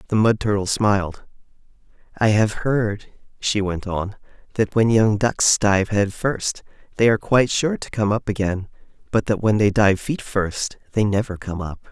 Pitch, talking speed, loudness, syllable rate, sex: 105 Hz, 180 wpm, -20 LUFS, 4.6 syllables/s, male